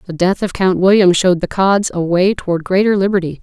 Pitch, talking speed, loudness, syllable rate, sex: 185 Hz, 230 wpm, -14 LUFS, 5.9 syllables/s, female